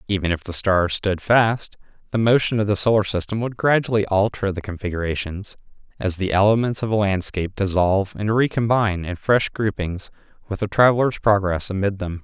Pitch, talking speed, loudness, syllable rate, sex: 100 Hz, 170 wpm, -20 LUFS, 5.5 syllables/s, male